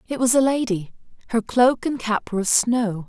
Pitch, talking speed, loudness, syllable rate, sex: 230 Hz, 215 wpm, -21 LUFS, 5.1 syllables/s, female